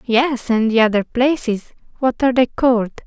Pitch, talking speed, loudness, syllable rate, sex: 240 Hz, 175 wpm, -17 LUFS, 5.1 syllables/s, female